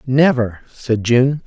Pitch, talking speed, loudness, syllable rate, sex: 125 Hz, 125 wpm, -16 LUFS, 3.2 syllables/s, male